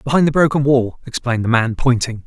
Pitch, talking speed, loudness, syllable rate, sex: 130 Hz, 210 wpm, -17 LUFS, 6.0 syllables/s, male